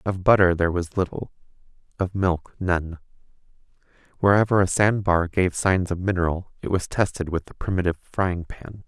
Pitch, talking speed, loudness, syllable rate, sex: 90 Hz, 160 wpm, -23 LUFS, 5.3 syllables/s, male